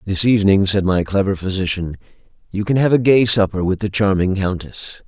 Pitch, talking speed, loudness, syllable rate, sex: 100 Hz, 190 wpm, -17 LUFS, 5.5 syllables/s, male